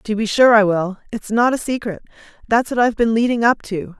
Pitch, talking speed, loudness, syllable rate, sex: 220 Hz, 240 wpm, -17 LUFS, 5.7 syllables/s, female